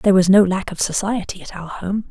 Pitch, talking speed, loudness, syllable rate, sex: 190 Hz, 255 wpm, -18 LUFS, 5.8 syllables/s, female